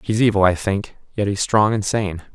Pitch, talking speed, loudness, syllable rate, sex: 100 Hz, 230 wpm, -19 LUFS, 5.0 syllables/s, male